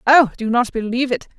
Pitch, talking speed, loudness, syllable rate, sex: 245 Hz, 215 wpm, -18 LUFS, 6.3 syllables/s, female